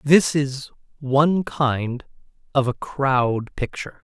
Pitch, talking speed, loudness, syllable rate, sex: 135 Hz, 115 wpm, -21 LUFS, 3.5 syllables/s, male